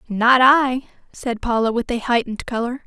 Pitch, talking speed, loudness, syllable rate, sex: 240 Hz, 170 wpm, -18 LUFS, 5.0 syllables/s, female